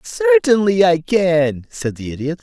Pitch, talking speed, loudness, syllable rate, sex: 185 Hz, 150 wpm, -16 LUFS, 3.9 syllables/s, male